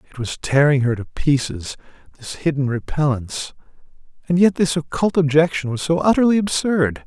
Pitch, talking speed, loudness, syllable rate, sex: 150 Hz, 155 wpm, -19 LUFS, 5.3 syllables/s, male